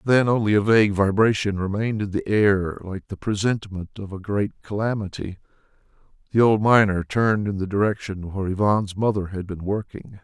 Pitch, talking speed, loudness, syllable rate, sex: 100 Hz, 170 wpm, -22 LUFS, 5.4 syllables/s, male